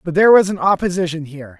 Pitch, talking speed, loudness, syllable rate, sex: 175 Hz, 225 wpm, -15 LUFS, 7.5 syllables/s, male